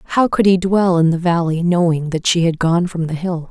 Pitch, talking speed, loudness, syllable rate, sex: 170 Hz, 255 wpm, -16 LUFS, 5.3 syllables/s, female